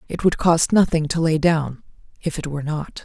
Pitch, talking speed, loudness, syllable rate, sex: 160 Hz, 215 wpm, -20 LUFS, 5.2 syllables/s, female